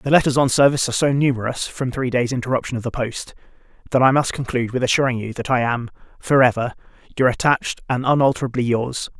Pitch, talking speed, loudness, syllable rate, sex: 125 Hz, 200 wpm, -19 LUFS, 6.6 syllables/s, male